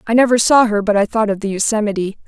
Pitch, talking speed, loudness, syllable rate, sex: 215 Hz, 265 wpm, -15 LUFS, 6.8 syllables/s, female